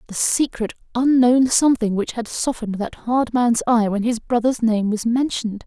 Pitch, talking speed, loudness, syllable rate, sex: 235 Hz, 180 wpm, -19 LUFS, 5.0 syllables/s, female